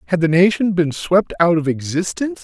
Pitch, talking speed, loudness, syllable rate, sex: 170 Hz, 195 wpm, -17 LUFS, 5.6 syllables/s, male